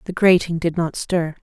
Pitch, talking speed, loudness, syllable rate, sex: 170 Hz, 200 wpm, -19 LUFS, 4.8 syllables/s, female